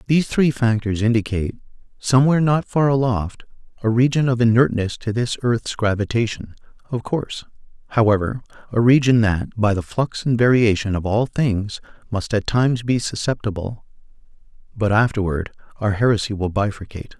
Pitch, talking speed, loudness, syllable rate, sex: 115 Hz, 140 wpm, -20 LUFS, 5.4 syllables/s, male